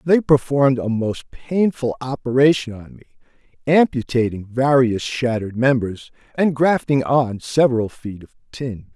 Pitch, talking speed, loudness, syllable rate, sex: 130 Hz, 125 wpm, -19 LUFS, 4.5 syllables/s, male